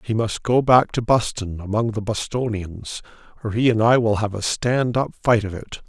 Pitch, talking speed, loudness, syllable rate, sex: 110 Hz, 205 wpm, -20 LUFS, 4.9 syllables/s, male